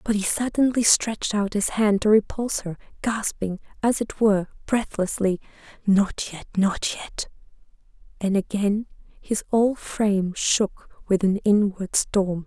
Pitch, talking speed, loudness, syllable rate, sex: 205 Hz, 135 wpm, -23 LUFS, 4.3 syllables/s, female